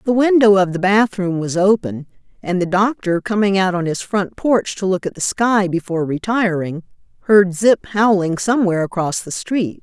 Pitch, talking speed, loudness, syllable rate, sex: 190 Hz, 185 wpm, -17 LUFS, 5.0 syllables/s, female